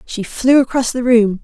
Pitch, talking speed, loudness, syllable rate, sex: 240 Hz, 210 wpm, -14 LUFS, 4.6 syllables/s, female